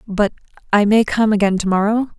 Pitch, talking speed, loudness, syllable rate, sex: 210 Hz, 165 wpm, -16 LUFS, 5.6 syllables/s, female